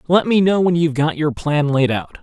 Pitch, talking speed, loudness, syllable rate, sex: 160 Hz, 270 wpm, -17 LUFS, 5.3 syllables/s, male